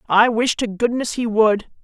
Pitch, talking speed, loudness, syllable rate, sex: 225 Hz, 195 wpm, -18 LUFS, 4.4 syllables/s, female